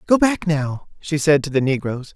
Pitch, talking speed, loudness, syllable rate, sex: 155 Hz, 225 wpm, -19 LUFS, 4.7 syllables/s, male